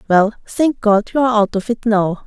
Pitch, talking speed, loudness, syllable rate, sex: 220 Hz, 210 wpm, -16 LUFS, 4.7 syllables/s, female